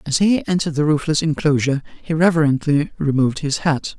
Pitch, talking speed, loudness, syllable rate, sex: 150 Hz, 165 wpm, -18 LUFS, 6.0 syllables/s, male